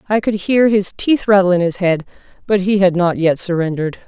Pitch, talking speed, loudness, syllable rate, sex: 190 Hz, 220 wpm, -15 LUFS, 5.5 syllables/s, female